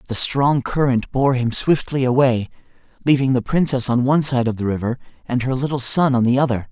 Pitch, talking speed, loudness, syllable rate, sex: 130 Hz, 205 wpm, -18 LUFS, 5.6 syllables/s, male